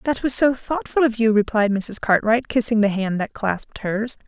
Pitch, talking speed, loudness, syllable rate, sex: 225 Hz, 210 wpm, -20 LUFS, 4.9 syllables/s, female